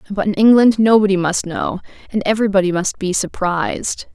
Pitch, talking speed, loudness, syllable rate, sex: 200 Hz, 160 wpm, -16 LUFS, 5.5 syllables/s, female